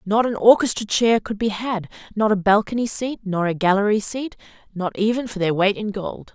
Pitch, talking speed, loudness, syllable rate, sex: 210 Hz, 210 wpm, -20 LUFS, 5.2 syllables/s, female